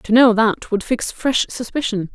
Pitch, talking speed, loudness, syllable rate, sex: 225 Hz, 195 wpm, -18 LUFS, 4.3 syllables/s, female